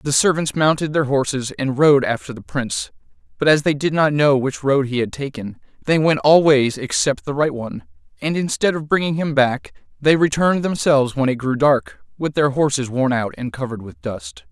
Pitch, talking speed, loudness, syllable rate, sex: 140 Hz, 210 wpm, -18 LUFS, 5.3 syllables/s, male